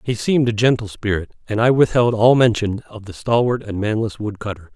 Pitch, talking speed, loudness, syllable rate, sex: 110 Hz, 215 wpm, -18 LUFS, 5.6 syllables/s, male